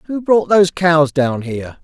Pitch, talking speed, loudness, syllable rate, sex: 165 Hz, 195 wpm, -14 LUFS, 4.9 syllables/s, male